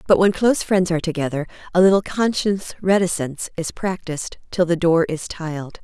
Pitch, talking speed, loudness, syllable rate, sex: 180 Hz, 175 wpm, -20 LUFS, 5.6 syllables/s, female